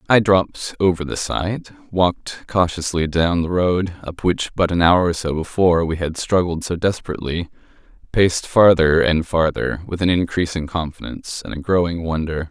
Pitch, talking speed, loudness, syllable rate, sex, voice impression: 85 Hz, 170 wpm, -19 LUFS, 5.1 syllables/s, male, masculine, adult-like, thick, tensed, powerful, hard, slightly muffled, cool, calm, mature, reassuring, wild, slightly kind